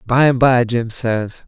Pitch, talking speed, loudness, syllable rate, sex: 120 Hz, 205 wpm, -16 LUFS, 3.7 syllables/s, male